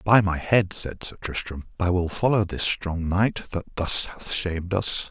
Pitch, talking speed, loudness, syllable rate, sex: 90 Hz, 200 wpm, -25 LUFS, 4.3 syllables/s, male